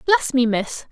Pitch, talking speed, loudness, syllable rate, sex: 255 Hz, 195 wpm, -19 LUFS, 4.2 syllables/s, female